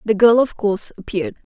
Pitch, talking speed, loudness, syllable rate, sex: 220 Hz, 190 wpm, -18 LUFS, 6.2 syllables/s, female